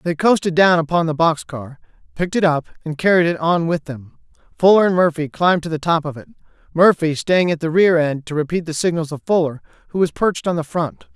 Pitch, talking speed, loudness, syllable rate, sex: 165 Hz, 230 wpm, -18 LUFS, 5.9 syllables/s, male